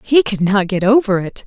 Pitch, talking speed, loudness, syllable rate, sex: 215 Hz, 245 wpm, -15 LUFS, 5.1 syllables/s, female